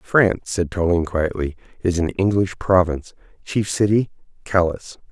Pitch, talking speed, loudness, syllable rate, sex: 90 Hz, 130 wpm, -20 LUFS, 5.4 syllables/s, male